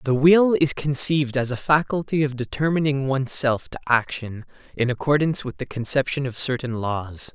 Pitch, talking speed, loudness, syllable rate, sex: 135 Hz, 165 wpm, -22 LUFS, 5.3 syllables/s, male